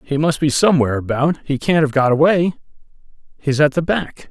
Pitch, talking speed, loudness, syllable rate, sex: 150 Hz, 165 wpm, -17 LUFS, 5.8 syllables/s, male